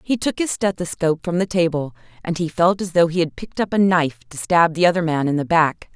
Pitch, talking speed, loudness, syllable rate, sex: 170 Hz, 260 wpm, -19 LUFS, 6.1 syllables/s, female